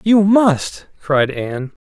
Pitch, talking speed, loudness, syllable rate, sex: 170 Hz, 130 wpm, -16 LUFS, 2.6 syllables/s, male